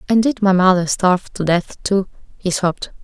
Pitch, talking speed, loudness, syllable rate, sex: 190 Hz, 195 wpm, -17 LUFS, 5.2 syllables/s, female